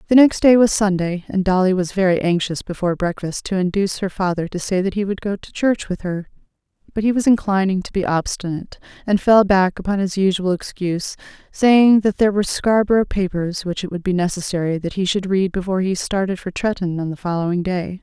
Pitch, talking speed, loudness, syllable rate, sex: 190 Hz, 215 wpm, -19 LUFS, 5.9 syllables/s, female